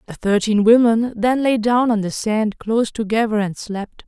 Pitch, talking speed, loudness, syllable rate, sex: 220 Hz, 190 wpm, -18 LUFS, 4.7 syllables/s, female